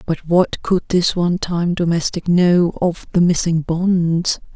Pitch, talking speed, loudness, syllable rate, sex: 175 Hz, 145 wpm, -17 LUFS, 3.8 syllables/s, female